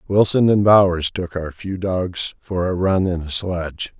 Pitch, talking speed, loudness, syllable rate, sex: 90 Hz, 195 wpm, -19 LUFS, 4.2 syllables/s, male